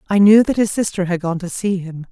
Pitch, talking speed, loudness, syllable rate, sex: 190 Hz, 285 wpm, -17 LUFS, 5.6 syllables/s, female